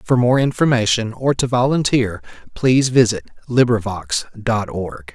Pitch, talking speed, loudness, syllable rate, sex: 120 Hz, 130 wpm, -18 LUFS, 4.6 syllables/s, male